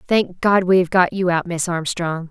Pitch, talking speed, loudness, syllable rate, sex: 180 Hz, 235 wpm, -18 LUFS, 4.5 syllables/s, female